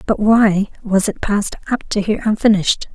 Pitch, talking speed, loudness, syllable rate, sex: 205 Hz, 185 wpm, -16 LUFS, 5.3 syllables/s, female